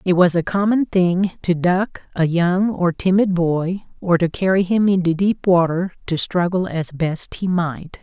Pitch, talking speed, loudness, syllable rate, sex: 180 Hz, 185 wpm, -19 LUFS, 4.2 syllables/s, female